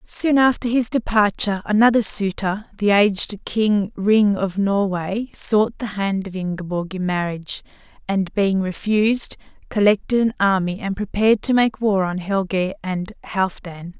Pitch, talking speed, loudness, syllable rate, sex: 200 Hz, 145 wpm, -20 LUFS, 4.4 syllables/s, female